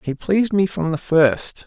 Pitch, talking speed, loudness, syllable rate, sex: 170 Hz, 215 wpm, -18 LUFS, 4.5 syllables/s, male